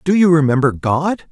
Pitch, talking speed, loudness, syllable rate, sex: 155 Hz, 185 wpm, -15 LUFS, 5.0 syllables/s, male